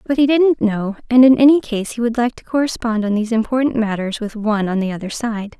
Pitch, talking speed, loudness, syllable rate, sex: 230 Hz, 245 wpm, -17 LUFS, 6.1 syllables/s, female